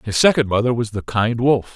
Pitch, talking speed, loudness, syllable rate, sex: 115 Hz, 240 wpm, -18 LUFS, 5.5 syllables/s, male